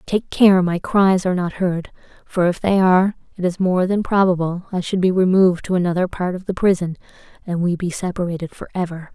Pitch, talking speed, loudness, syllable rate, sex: 180 Hz, 205 wpm, -19 LUFS, 5.6 syllables/s, female